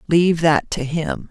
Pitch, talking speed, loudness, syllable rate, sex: 160 Hz, 185 wpm, -18 LUFS, 4.4 syllables/s, female